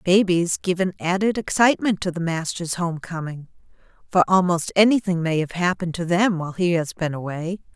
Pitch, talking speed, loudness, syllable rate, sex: 175 Hz, 170 wpm, -21 LUFS, 5.6 syllables/s, female